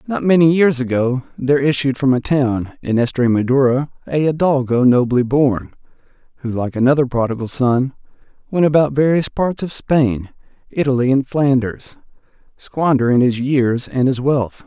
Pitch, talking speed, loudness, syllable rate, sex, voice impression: 135 Hz, 145 wpm, -16 LUFS, 4.7 syllables/s, male, masculine, adult-like, slightly bright, refreshing, friendly, slightly kind